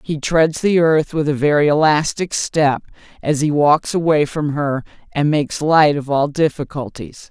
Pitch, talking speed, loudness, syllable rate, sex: 150 Hz, 170 wpm, -17 LUFS, 4.4 syllables/s, female